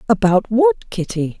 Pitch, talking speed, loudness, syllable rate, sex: 225 Hz, 130 wpm, -17 LUFS, 4.2 syllables/s, female